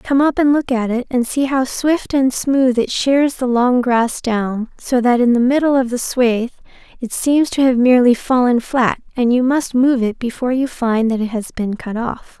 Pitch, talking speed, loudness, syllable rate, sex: 250 Hz, 225 wpm, -16 LUFS, 4.6 syllables/s, female